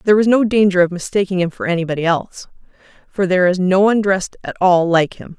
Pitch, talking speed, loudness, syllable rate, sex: 185 Hz, 225 wpm, -16 LUFS, 6.8 syllables/s, female